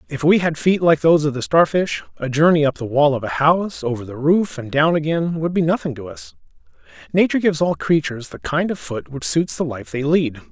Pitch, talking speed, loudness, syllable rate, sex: 145 Hz, 240 wpm, -19 LUFS, 5.8 syllables/s, male